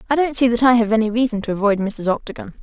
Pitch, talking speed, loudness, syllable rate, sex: 230 Hz, 275 wpm, -18 LUFS, 7.0 syllables/s, female